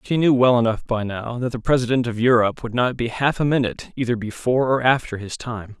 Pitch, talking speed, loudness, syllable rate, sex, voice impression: 120 Hz, 240 wpm, -20 LUFS, 6.0 syllables/s, male, masculine, adult-like, tensed, powerful, slightly bright, clear, fluent, cool, intellectual, calm, friendly, slightly reassuring, wild, lively